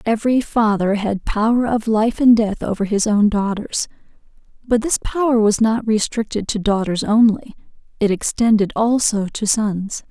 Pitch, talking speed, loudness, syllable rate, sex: 215 Hz, 155 wpm, -18 LUFS, 4.7 syllables/s, female